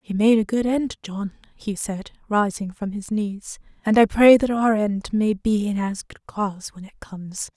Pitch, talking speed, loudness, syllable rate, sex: 210 Hz, 215 wpm, -21 LUFS, 4.5 syllables/s, female